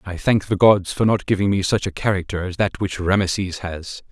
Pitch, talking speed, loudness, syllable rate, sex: 95 Hz, 235 wpm, -20 LUFS, 5.4 syllables/s, male